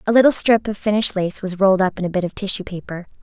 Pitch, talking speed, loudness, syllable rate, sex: 195 Hz, 280 wpm, -18 LUFS, 7.2 syllables/s, female